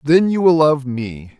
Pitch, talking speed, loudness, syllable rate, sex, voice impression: 145 Hz, 215 wpm, -16 LUFS, 4.0 syllables/s, male, masculine, adult-like, thick, tensed, powerful, slightly hard, clear, cool, intellectual, slightly mature, friendly, slightly reassuring, wild, lively, slightly intense